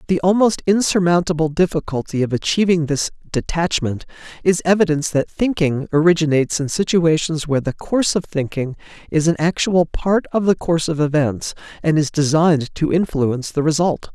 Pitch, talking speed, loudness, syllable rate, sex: 160 Hz, 155 wpm, -18 LUFS, 5.5 syllables/s, male